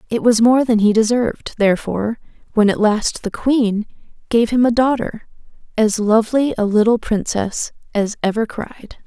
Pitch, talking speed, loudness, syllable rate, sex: 220 Hz, 150 wpm, -17 LUFS, 4.9 syllables/s, female